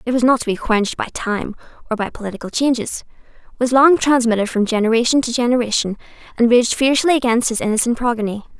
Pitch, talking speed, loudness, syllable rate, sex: 235 Hz, 180 wpm, -17 LUFS, 6.6 syllables/s, female